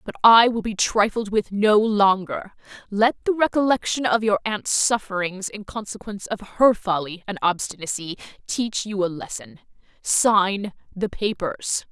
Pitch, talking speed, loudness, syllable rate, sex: 205 Hz, 140 wpm, -21 LUFS, 4.4 syllables/s, female